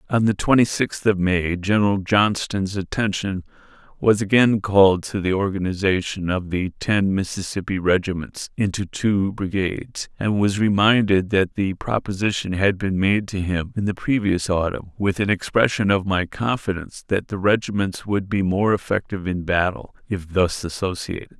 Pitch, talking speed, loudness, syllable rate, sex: 100 Hz, 155 wpm, -21 LUFS, 4.9 syllables/s, male